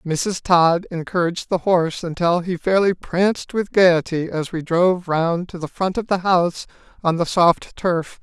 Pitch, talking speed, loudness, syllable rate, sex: 175 Hz, 180 wpm, -19 LUFS, 4.5 syllables/s, male